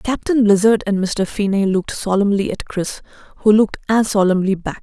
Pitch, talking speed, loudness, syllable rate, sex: 205 Hz, 175 wpm, -17 LUFS, 5.4 syllables/s, female